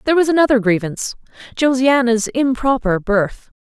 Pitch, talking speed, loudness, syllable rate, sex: 245 Hz, 115 wpm, -16 LUFS, 5.4 syllables/s, female